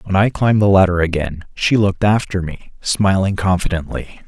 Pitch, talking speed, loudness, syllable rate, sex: 95 Hz, 170 wpm, -16 LUFS, 5.3 syllables/s, male